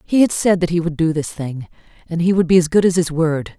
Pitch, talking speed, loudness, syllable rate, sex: 165 Hz, 300 wpm, -17 LUFS, 5.8 syllables/s, female